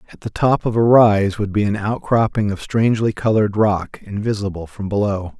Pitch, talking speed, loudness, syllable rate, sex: 105 Hz, 190 wpm, -18 LUFS, 5.4 syllables/s, male